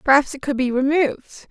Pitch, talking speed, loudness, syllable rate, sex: 275 Hz, 200 wpm, -19 LUFS, 6.8 syllables/s, female